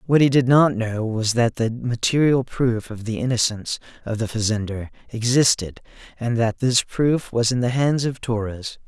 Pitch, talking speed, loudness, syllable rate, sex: 120 Hz, 185 wpm, -21 LUFS, 4.7 syllables/s, male